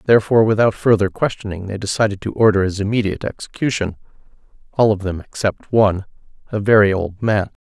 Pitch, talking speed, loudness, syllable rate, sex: 105 Hz, 150 wpm, -18 LUFS, 6.3 syllables/s, male